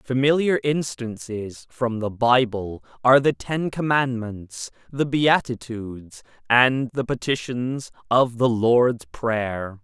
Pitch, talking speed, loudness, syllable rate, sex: 120 Hz, 110 wpm, -22 LUFS, 3.5 syllables/s, male